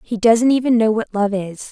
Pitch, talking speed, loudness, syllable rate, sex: 220 Hz, 245 wpm, -17 LUFS, 5.0 syllables/s, female